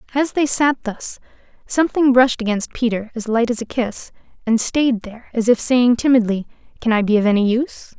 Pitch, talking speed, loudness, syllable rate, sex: 235 Hz, 195 wpm, -18 LUFS, 5.6 syllables/s, female